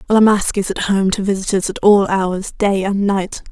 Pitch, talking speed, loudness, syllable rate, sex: 200 Hz, 220 wpm, -16 LUFS, 4.6 syllables/s, female